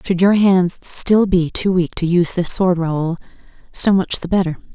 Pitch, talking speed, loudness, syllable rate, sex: 180 Hz, 200 wpm, -16 LUFS, 4.6 syllables/s, female